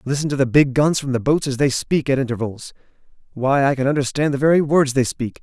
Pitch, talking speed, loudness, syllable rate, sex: 135 Hz, 245 wpm, -19 LUFS, 6.0 syllables/s, male